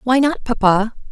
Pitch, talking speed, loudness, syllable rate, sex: 235 Hz, 160 wpm, -17 LUFS, 4.5 syllables/s, female